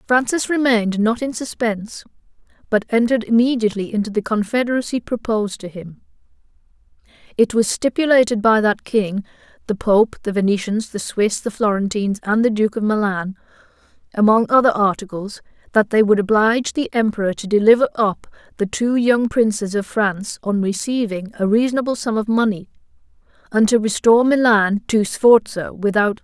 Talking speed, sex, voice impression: 160 wpm, female, feminine, adult-like, tensed, bright, soft, slightly raspy, intellectual, calm, slightly friendly, reassuring, kind, slightly modest